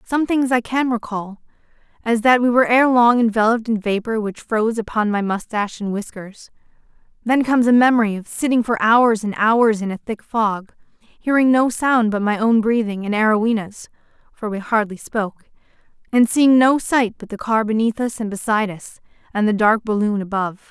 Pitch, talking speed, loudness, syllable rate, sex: 225 Hz, 185 wpm, -18 LUFS, 5.2 syllables/s, female